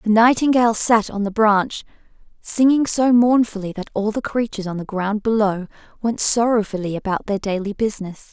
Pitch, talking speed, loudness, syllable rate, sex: 215 Hz, 165 wpm, -19 LUFS, 5.3 syllables/s, female